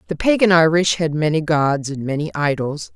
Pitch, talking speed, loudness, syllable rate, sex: 160 Hz, 180 wpm, -18 LUFS, 5.2 syllables/s, female